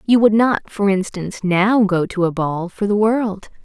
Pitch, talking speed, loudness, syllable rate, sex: 200 Hz, 215 wpm, -17 LUFS, 4.4 syllables/s, female